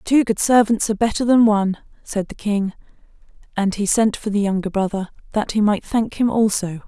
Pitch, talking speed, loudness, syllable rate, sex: 210 Hz, 200 wpm, -19 LUFS, 5.5 syllables/s, female